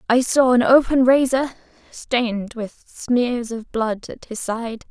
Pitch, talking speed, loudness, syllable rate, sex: 240 Hz, 160 wpm, -19 LUFS, 3.8 syllables/s, female